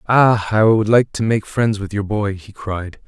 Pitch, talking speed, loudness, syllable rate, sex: 105 Hz, 255 wpm, -17 LUFS, 4.5 syllables/s, male